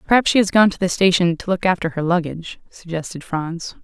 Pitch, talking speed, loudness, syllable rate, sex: 175 Hz, 220 wpm, -19 LUFS, 6.1 syllables/s, female